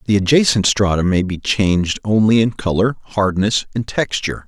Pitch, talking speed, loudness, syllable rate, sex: 105 Hz, 160 wpm, -16 LUFS, 5.2 syllables/s, male